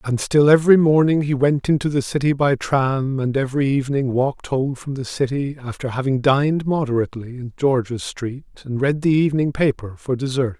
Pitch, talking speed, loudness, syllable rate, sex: 135 Hz, 185 wpm, -19 LUFS, 5.5 syllables/s, male